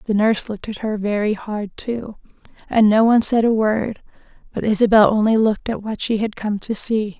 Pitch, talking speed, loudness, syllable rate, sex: 215 Hz, 210 wpm, -19 LUFS, 5.4 syllables/s, female